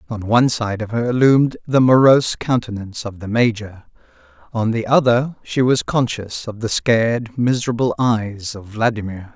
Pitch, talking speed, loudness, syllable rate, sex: 115 Hz, 160 wpm, -18 LUFS, 4.9 syllables/s, male